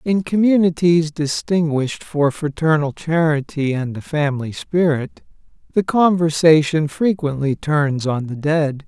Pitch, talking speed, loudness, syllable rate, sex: 155 Hz, 115 wpm, -18 LUFS, 4.2 syllables/s, male